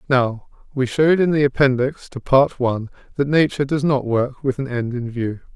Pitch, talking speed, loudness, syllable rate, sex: 130 Hz, 205 wpm, -19 LUFS, 5.2 syllables/s, male